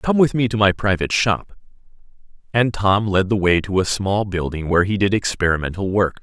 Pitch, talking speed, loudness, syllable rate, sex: 100 Hz, 200 wpm, -19 LUFS, 5.5 syllables/s, male